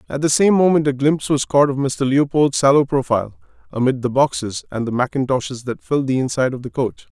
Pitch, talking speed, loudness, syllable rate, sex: 135 Hz, 215 wpm, -18 LUFS, 6.1 syllables/s, male